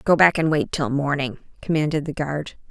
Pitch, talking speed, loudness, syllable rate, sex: 150 Hz, 200 wpm, -22 LUFS, 5.2 syllables/s, female